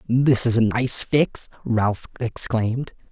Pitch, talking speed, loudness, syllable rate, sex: 120 Hz, 135 wpm, -21 LUFS, 3.5 syllables/s, male